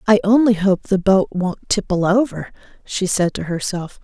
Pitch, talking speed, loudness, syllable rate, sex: 200 Hz, 180 wpm, -18 LUFS, 4.6 syllables/s, female